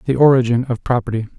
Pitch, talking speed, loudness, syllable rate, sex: 125 Hz, 175 wpm, -16 LUFS, 7.1 syllables/s, male